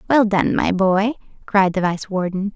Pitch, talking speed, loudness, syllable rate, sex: 195 Hz, 190 wpm, -19 LUFS, 4.4 syllables/s, female